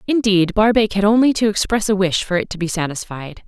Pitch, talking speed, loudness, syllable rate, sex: 200 Hz, 225 wpm, -17 LUFS, 5.7 syllables/s, female